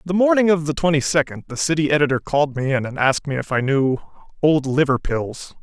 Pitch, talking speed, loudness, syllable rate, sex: 145 Hz, 215 wpm, -19 LUFS, 5.9 syllables/s, male